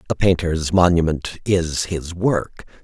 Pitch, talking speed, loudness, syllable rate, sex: 85 Hz, 125 wpm, -19 LUFS, 3.7 syllables/s, male